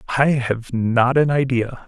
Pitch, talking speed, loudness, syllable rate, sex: 125 Hz, 160 wpm, -19 LUFS, 4.0 syllables/s, male